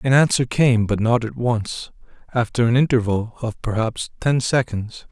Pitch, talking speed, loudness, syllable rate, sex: 120 Hz, 165 wpm, -20 LUFS, 4.5 syllables/s, male